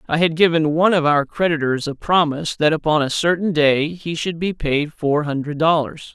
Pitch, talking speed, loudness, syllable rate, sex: 155 Hz, 205 wpm, -18 LUFS, 5.2 syllables/s, male